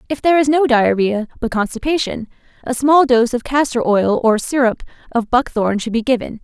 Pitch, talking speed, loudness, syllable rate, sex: 245 Hz, 185 wpm, -16 LUFS, 5.4 syllables/s, female